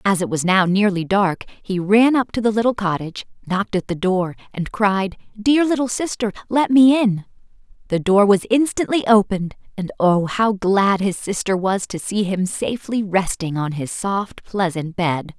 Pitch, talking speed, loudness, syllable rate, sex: 200 Hz, 185 wpm, -19 LUFS, 4.7 syllables/s, female